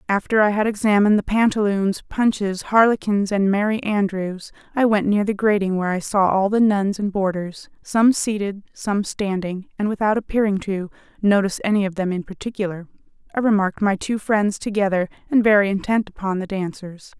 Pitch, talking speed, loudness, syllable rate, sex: 200 Hz, 175 wpm, -20 LUFS, 5.4 syllables/s, female